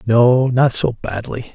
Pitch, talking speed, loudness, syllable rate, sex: 120 Hz, 155 wpm, -16 LUFS, 3.6 syllables/s, male